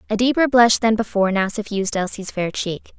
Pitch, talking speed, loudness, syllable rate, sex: 210 Hz, 200 wpm, -19 LUFS, 5.8 syllables/s, female